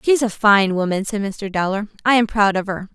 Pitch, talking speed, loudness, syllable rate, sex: 205 Hz, 245 wpm, -18 LUFS, 5.3 syllables/s, female